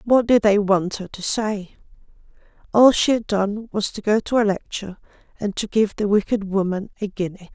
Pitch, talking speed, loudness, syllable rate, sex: 205 Hz, 200 wpm, -21 LUFS, 5.1 syllables/s, female